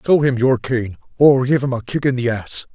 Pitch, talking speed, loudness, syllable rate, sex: 125 Hz, 260 wpm, -17 LUFS, 5.2 syllables/s, male